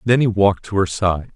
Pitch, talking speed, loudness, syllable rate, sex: 100 Hz, 265 wpm, -18 LUFS, 5.7 syllables/s, male